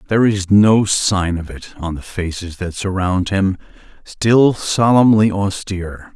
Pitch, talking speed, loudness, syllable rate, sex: 100 Hz, 135 wpm, -16 LUFS, 4.0 syllables/s, male